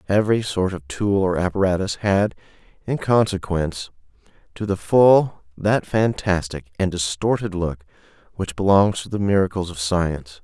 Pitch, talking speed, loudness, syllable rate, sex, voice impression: 95 Hz, 140 wpm, -21 LUFS, 4.8 syllables/s, male, masculine, slightly young, slightly adult-like, slightly thick, slightly tensed, slightly powerful, bright, slightly hard, clear, fluent, very cool, intellectual, very refreshing, very sincere, very calm, very mature, friendly, very reassuring, slightly unique, slightly elegant, very wild, slightly sweet, slightly lively, very kind